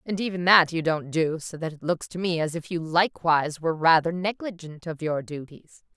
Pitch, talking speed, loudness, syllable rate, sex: 165 Hz, 220 wpm, -24 LUFS, 5.4 syllables/s, female